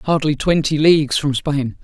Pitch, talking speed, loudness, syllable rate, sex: 145 Hz, 165 wpm, -17 LUFS, 4.5 syllables/s, male